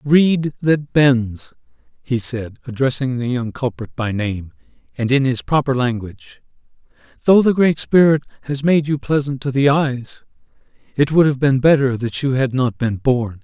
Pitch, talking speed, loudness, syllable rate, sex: 130 Hz, 170 wpm, -17 LUFS, 4.5 syllables/s, male